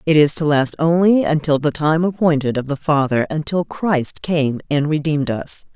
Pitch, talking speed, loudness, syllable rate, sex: 155 Hz, 190 wpm, -18 LUFS, 4.8 syllables/s, female